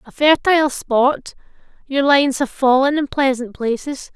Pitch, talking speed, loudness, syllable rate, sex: 270 Hz, 145 wpm, -17 LUFS, 4.6 syllables/s, female